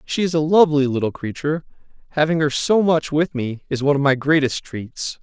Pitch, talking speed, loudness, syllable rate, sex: 145 Hz, 205 wpm, -19 LUFS, 5.7 syllables/s, male